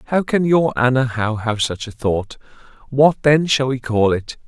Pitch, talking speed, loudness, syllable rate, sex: 125 Hz, 190 wpm, -18 LUFS, 4.8 syllables/s, male